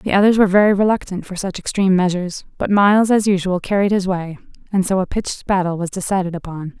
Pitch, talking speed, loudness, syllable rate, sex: 190 Hz, 210 wpm, -17 LUFS, 6.5 syllables/s, female